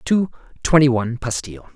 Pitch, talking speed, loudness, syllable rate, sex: 130 Hz, 135 wpm, -19 LUFS, 6.6 syllables/s, male